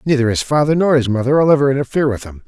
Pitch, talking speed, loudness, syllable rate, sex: 135 Hz, 265 wpm, -15 LUFS, 7.7 syllables/s, male